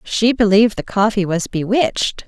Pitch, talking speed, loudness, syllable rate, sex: 210 Hz, 160 wpm, -16 LUFS, 5.1 syllables/s, female